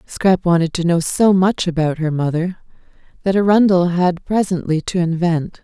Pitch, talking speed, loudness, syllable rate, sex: 175 Hz, 160 wpm, -17 LUFS, 4.8 syllables/s, female